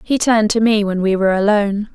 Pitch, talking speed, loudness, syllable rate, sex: 210 Hz, 245 wpm, -15 LUFS, 6.6 syllables/s, female